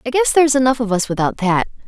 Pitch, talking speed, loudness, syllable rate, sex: 235 Hz, 255 wpm, -16 LUFS, 7.1 syllables/s, female